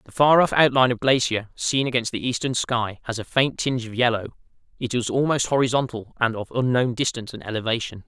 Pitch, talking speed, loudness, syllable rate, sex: 120 Hz, 200 wpm, -22 LUFS, 6.0 syllables/s, male